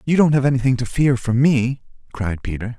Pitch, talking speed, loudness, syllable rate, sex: 125 Hz, 215 wpm, -19 LUFS, 5.6 syllables/s, male